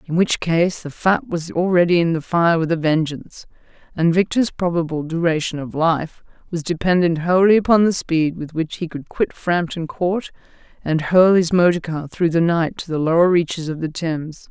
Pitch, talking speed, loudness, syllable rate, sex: 170 Hz, 195 wpm, -19 LUFS, 5.0 syllables/s, female